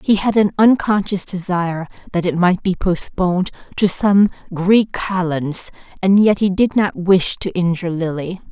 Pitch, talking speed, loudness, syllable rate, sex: 185 Hz, 160 wpm, -17 LUFS, 4.4 syllables/s, female